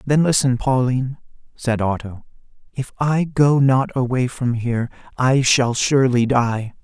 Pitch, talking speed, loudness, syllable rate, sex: 125 Hz, 140 wpm, -18 LUFS, 4.4 syllables/s, male